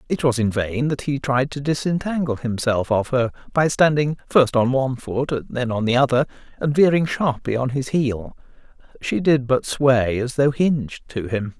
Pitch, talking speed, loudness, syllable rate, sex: 130 Hz, 190 wpm, -20 LUFS, 4.7 syllables/s, male